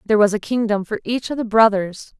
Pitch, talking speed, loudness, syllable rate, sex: 215 Hz, 245 wpm, -18 LUFS, 6.0 syllables/s, female